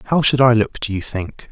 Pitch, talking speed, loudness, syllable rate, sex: 115 Hz, 275 wpm, -17 LUFS, 4.8 syllables/s, male